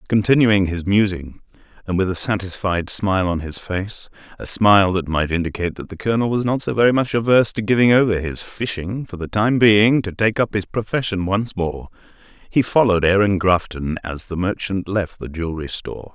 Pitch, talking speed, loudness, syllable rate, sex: 100 Hz, 195 wpm, -19 LUFS, 5.5 syllables/s, male